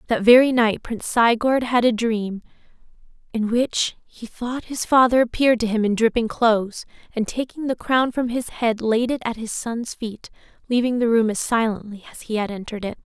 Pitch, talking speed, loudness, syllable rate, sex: 230 Hz, 195 wpm, -21 LUFS, 5.2 syllables/s, female